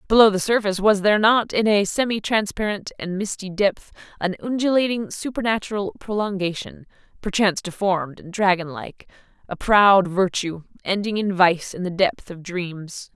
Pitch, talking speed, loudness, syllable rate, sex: 195 Hz, 145 wpm, -21 LUFS, 5.0 syllables/s, female